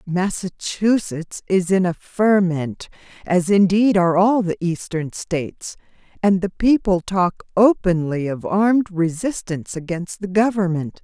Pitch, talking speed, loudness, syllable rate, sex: 185 Hz, 125 wpm, -19 LUFS, 4.2 syllables/s, female